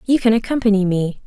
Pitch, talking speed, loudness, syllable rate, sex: 215 Hz, 190 wpm, -17 LUFS, 6.3 syllables/s, female